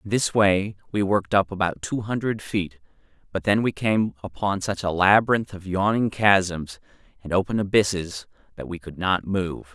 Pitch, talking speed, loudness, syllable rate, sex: 95 Hz, 180 wpm, -23 LUFS, 4.8 syllables/s, male